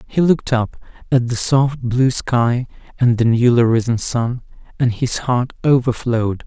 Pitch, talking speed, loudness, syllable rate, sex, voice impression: 120 Hz, 160 wpm, -17 LUFS, 4.4 syllables/s, male, very masculine, very adult-like, very thick, slightly relaxed, slightly weak, slightly bright, soft, slightly muffled, fluent, slightly raspy, cute, very intellectual, refreshing, sincere, very calm, slightly mature, very friendly, very reassuring, unique, elegant, slightly wild, sweet, slightly lively, kind, modest